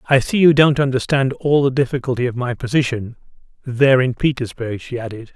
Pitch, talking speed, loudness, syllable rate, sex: 130 Hz, 180 wpm, -17 LUFS, 5.7 syllables/s, male